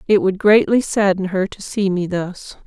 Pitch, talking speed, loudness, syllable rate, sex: 195 Hz, 200 wpm, -17 LUFS, 4.5 syllables/s, female